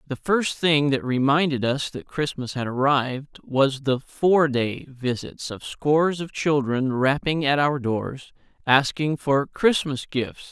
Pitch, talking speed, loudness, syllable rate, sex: 140 Hz, 150 wpm, -23 LUFS, 4.0 syllables/s, male